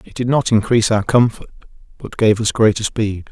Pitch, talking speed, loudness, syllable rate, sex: 110 Hz, 200 wpm, -16 LUFS, 5.6 syllables/s, male